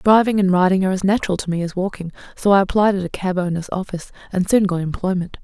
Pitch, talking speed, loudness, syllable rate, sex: 185 Hz, 230 wpm, -19 LUFS, 6.9 syllables/s, female